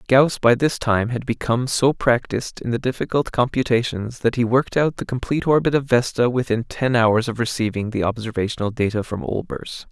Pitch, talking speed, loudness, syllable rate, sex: 120 Hz, 190 wpm, -20 LUFS, 5.6 syllables/s, male